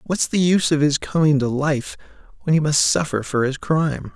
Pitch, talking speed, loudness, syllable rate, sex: 145 Hz, 215 wpm, -19 LUFS, 5.3 syllables/s, male